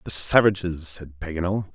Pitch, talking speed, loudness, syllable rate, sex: 90 Hz, 140 wpm, -23 LUFS, 5.4 syllables/s, male